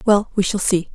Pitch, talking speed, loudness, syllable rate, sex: 200 Hz, 255 wpm, -19 LUFS, 5.3 syllables/s, female